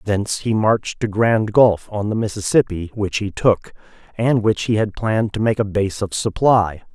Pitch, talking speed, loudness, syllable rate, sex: 105 Hz, 200 wpm, -19 LUFS, 4.8 syllables/s, male